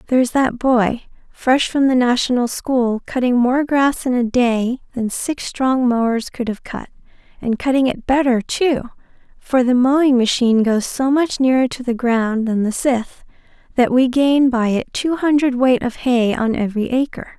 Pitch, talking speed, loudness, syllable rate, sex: 250 Hz, 185 wpm, -17 LUFS, 4.6 syllables/s, female